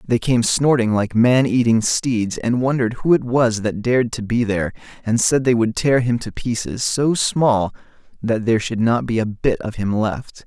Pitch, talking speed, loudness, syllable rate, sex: 115 Hz, 210 wpm, -18 LUFS, 4.8 syllables/s, male